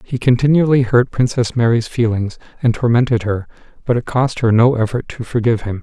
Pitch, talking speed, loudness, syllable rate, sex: 120 Hz, 185 wpm, -16 LUFS, 5.6 syllables/s, male